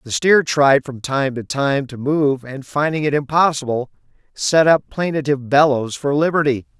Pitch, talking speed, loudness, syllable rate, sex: 140 Hz, 170 wpm, -18 LUFS, 4.6 syllables/s, male